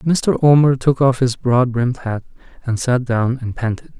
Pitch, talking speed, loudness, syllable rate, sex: 125 Hz, 195 wpm, -17 LUFS, 4.6 syllables/s, male